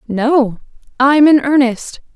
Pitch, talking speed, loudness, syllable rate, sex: 260 Hz, 110 wpm, -12 LUFS, 3.3 syllables/s, female